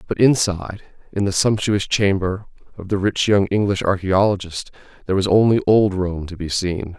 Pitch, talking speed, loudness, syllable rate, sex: 100 Hz, 170 wpm, -19 LUFS, 5.1 syllables/s, male